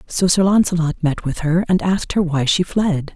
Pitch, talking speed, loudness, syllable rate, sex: 170 Hz, 230 wpm, -18 LUFS, 5.1 syllables/s, female